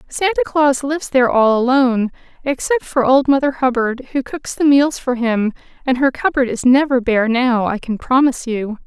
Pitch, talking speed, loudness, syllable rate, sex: 260 Hz, 190 wpm, -16 LUFS, 5.0 syllables/s, female